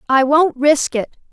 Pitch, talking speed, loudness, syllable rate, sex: 285 Hz, 180 wpm, -15 LUFS, 3.9 syllables/s, female